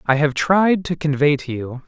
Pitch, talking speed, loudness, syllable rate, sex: 150 Hz, 225 wpm, -18 LUFS, 4.6 syllables/s, male